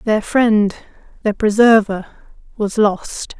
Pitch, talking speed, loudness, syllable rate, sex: 215 Hz, 105 wpm, -16 LUFS, 3.6 syllables/s, female